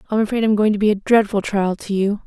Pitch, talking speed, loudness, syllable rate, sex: 210 Hz, 290 wpm, -18 LUFS, 6.5 syllables/s, female